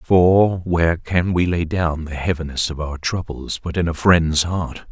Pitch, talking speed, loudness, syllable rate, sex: 85 Hz, 195 wpm, -19 LUFS, 4.3 syllables/s, male